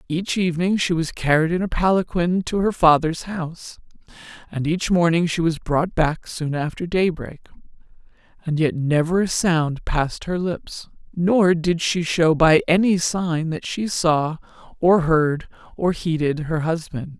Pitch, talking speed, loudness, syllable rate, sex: 165 Hz, 160 wpm, -20 LUFS, 4.3 syllables/s, female